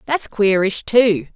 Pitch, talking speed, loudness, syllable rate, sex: 210 Hz, 130 wpm, -17 LUFS, 3.5 syllables/s, female